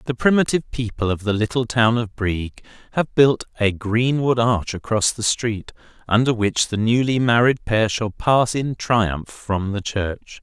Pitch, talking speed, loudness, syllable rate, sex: 115 Hz, 175 wpm, -20 LUFS, 4.2 syllables/s, male